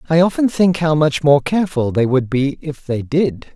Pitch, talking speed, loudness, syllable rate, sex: 150 Hz, 220 wpm, -16 LUFS, 4.9 syllables/s, male